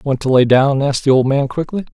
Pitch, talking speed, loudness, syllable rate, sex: 140 Hz, 280 wpm, -15 LUFS, 6.2 syllables/s, male